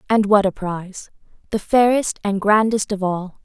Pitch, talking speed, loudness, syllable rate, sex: 205 Hz, 175 wpm, -19 LUFS, 4.8 syllables/s, female